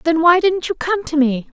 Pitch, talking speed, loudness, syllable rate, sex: 325 Hz, 265 wpm, -16 LUFS, 5.0 syllables/s, female